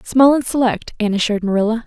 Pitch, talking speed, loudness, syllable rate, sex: 225 Hz, 195 wpm, -17 LUFS, 6.9 syllables/s, female